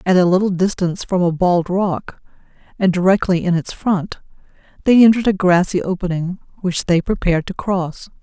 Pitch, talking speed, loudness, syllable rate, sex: 185 Hz, 170 wpm, -17 LUFS, 5.4 syllables/s, female